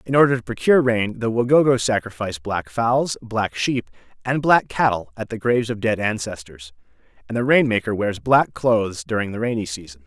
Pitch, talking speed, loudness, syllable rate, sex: 110 Hz, 190 wpm, -20 LUFS, 5.5 syllables/s, male